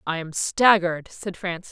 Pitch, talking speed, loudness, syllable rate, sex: 180 Hz, 175 wpm, -22 LUFS, 5.0 syllables/s, female